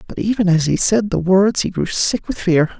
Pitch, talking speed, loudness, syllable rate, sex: 190 Hz, 255 wpm, -17 LUFS, 5.1 syllables/s, female